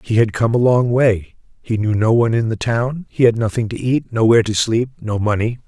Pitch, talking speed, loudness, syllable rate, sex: 115 Hz, 245 wpm, -17 LUFS, 5.5 syllables/s, male